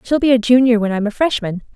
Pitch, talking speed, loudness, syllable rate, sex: 235 Hz, 275 wpm, -15 LUFS, 6.4 syllables/s, female